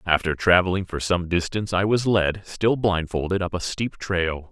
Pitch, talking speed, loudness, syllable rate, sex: 90 Hz, 185 wpm, -23 LUFS, 4.8 syllables/s, male